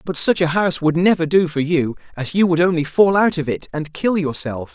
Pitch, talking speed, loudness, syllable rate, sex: 170 Hz, 255 wpm, -18 LUFS, 5.5 syllables/s, male